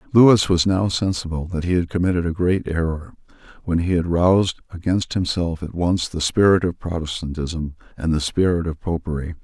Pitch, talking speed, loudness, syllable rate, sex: 85 Hz, 180 wpm, -20 LUFS, 5.4 syllables/s, male